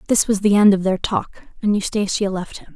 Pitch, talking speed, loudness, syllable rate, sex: 200 Hz, 240 wpm, -18 LUFS, 5.5 syllables/s, female